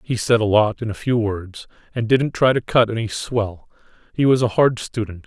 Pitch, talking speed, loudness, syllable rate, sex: 115 Hz, 230 wpm, -19 LUFS, 4.9 syllables/s, male